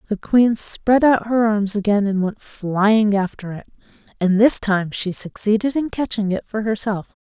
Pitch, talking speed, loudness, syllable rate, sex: 210 Hz, 180 wpm, -18 LUFS, 4.4 syllables/s, female